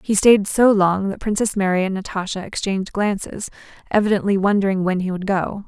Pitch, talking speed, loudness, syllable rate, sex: 195 Hz, 180 wpm, -19 LUFS, 5.6 syllables/s, female